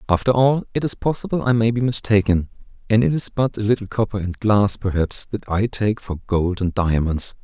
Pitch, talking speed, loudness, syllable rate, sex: 110 Hz, 210 wpm, -20 LUFS, 5.2 syllables/s, male